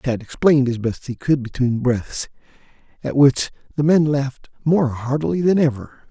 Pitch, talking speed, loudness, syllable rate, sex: 135 Hz, 165 wpm, -19 LUFS, 5.0 syllables/s, male